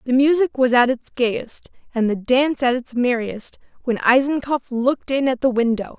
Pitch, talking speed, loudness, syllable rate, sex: 250 Hz, 190 wpm, -19 LUFS, 4.9 syllables/s, female